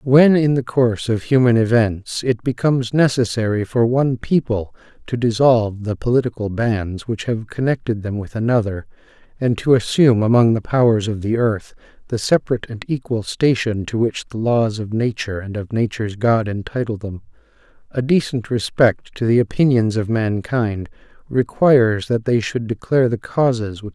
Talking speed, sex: 180 wpm, male